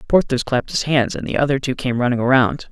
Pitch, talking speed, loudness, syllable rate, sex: 135 Hz, 245 wpm, -18 LUFS, 6.3 syllables/s, male